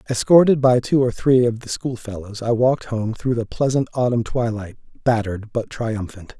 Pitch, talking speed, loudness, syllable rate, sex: 120 Hz, 180 wpm, -20 LUFS, 5.1 syllables/s, male